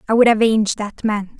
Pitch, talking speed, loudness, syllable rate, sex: 215 Hz, 215 wpm, -17 LUFS, 6.1 syllables/s, female